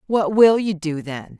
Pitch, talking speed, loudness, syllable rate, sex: 185 Hz, 215 wpm, -18 LUFS, 4.1 syllables/s, female